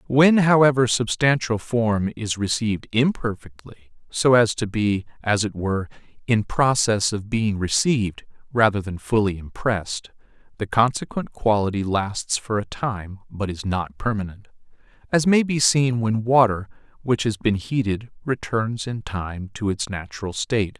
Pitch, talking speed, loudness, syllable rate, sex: 110 Hz, 145 wpm, -22 LUFS, 4.5 syllables/s, male